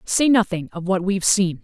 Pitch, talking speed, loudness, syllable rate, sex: 190 Hz, 220 wpm, -19 LUFS, 5.3 syllables/s, female